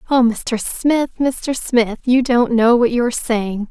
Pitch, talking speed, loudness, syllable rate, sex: 240 Hz, 195 wpm, -17 LUFS, 3.9 syllables/s, female